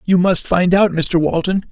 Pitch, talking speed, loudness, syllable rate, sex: 180 Hz, 210 wpm, -15 LUFS, 4.4 syllables/s, male